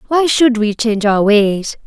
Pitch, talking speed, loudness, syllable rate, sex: 230 Hz, 195 wpm, -13 LUFS, 4.4 syllables/s, female